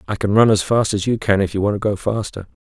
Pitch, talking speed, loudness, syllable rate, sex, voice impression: 105 Hz, 320 wpm, -18 LUFS, 6.4 syllables/s, male, masculine, adult-like, relaxed, weak, muffled, slightly halting, slightly mature, slightly friendly, unique, slightly wild, slightly kind, modest